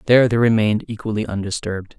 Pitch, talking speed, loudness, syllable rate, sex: 110 Hz, 150 wpm, -19 LUFS, 7.2 syllables/s, male